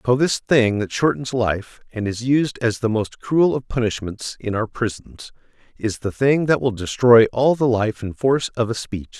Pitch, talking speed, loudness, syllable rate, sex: 120 Hz, 210 wpm, -20 LUFS, 4.5 syllables/s, male